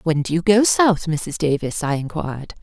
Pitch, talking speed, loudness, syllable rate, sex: 170 Hz, 205 wpm, -19 LUFS, 4.9 syllables/s, female